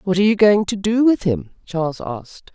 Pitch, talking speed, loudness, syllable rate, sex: 195 Hz, 235 wpm, -18 LUFS, 5.6 syllables/s, female